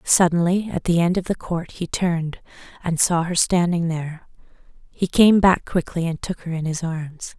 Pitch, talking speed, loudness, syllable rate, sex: 170 Hz, 195 wpm, -21 LUFS, 4.8 syllables/s, female